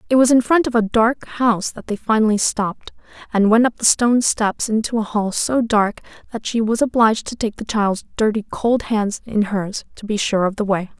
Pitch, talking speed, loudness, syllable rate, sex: 220 Hz, 230 wpm, -18 LUFS, 5.2 syllables/s, female